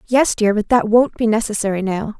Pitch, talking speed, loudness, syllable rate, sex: 220 Hz, 220 wpm, -17 LUFS, 5.5 syllables/s, female